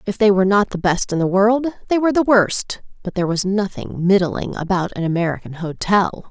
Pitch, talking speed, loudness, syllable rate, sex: 195 Hz, 210 wpm, -18 LUFS, 5.5 syllables/s, female